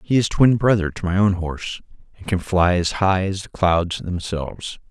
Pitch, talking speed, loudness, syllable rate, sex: 95 Hz, 210 wpm, -20 LUFS, 4.8 syllables/s, male